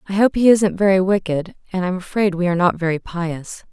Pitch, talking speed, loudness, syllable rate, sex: 185 Hz, 225 wpm, -18 LUFS, 5.7 syllables/s, female